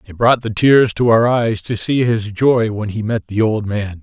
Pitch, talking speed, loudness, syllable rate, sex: 110 Hz, 255 wpm, -16 LUFS, 4.4 syllables/s, male